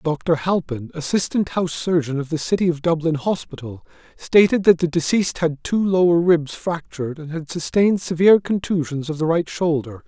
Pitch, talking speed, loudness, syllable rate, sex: 165 Hz, 175 wpm, -20 LUFS, 5.3 syllables/s, male